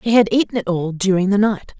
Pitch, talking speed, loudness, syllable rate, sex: 200 Hz, 270 wpm, -17 LUFS, 5.9 syllables/s, female